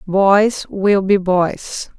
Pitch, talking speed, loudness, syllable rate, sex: 195 Hz, 120 wpm, -15 LUFS, 2.3 syllables/s, female